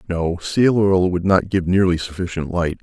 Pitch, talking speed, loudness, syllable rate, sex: 90 Hz, 190 wpm, -18 LUFS, 4.6 syllables/s, male